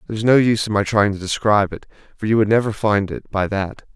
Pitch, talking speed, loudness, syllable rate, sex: 105 Hz, 245 wpm, -18 LUFS, 6.2 syllables/s, male